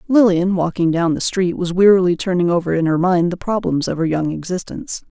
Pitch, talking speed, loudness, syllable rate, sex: 180 Hz, 210 wpm, -17 LUFS, 5.7 syllables/s, female